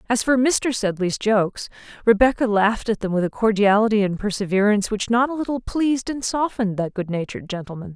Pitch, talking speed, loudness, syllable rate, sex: 215 Hz, 180 wpm, -21 LUFS, 6.1 syllables/s, female